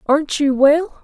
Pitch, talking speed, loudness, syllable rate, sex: 290 Hz, 175 wpm, -15 LUFS, 4.5 syllables/s, female